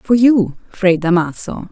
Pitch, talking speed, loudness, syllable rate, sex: 190 Hz, 140 wpm, -15 LUFS, 3.9 syllables/s, female